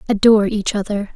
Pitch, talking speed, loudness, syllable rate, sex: 210 Hz, 155 wpm, -16 LUFS, 6.3 syllables/s, female